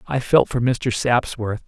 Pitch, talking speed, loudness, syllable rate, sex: 120 Hz, 180 wpm, -20 LUFS, 4.0 syllables/s, male